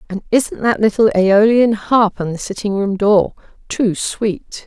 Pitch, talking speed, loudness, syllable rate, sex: 210 Hz, 165 wpm, -15 LUFS, 4.3 syllables/s, female